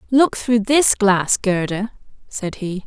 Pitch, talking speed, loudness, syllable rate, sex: 210 Hz, 145 wpm, -18 LUFS, 3.5 syllables/s, female